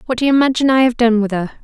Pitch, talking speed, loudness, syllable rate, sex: 240 Hz, 330 wpm, -14 LUFS, 8.8 syllables/s, female